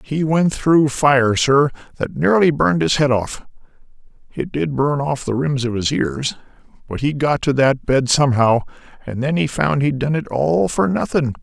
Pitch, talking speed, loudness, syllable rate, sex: 135 Hz, 185 wpm, -17 LUFS, 4.6 syllables/s, male